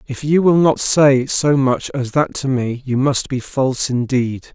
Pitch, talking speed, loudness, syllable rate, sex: 135 Hz, 210 wpm, -16 LUFS, 4.1 syllables/s, male